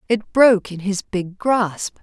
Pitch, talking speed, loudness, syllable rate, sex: 205 Hz, 175 wpm, -19 LUFS, 3.9 syllables/s, female